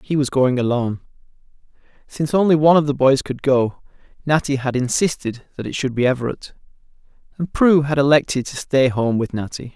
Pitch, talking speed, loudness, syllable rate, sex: 135 Hz, 180 wpm, -18 LUFS, 5.8 syllables/s, male